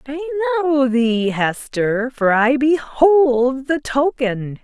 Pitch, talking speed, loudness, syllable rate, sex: 270 Hz, 115 wpm, -17 LUFS, 3.6 syllables/s, female